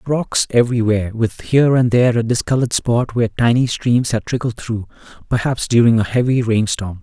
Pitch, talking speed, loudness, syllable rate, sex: 115 Hz, 170 wpm, -17 LUFS, 5.7 syllables/s, male